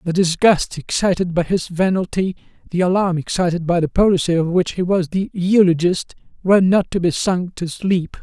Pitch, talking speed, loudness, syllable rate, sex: 180 Hz, 180 wpm, -18 LUFS, 5.3 syllables/s, male